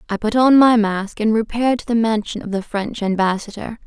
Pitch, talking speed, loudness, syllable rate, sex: 220 Hz, 215 wpm, -18 LUFS, 5.5 syllables/s, female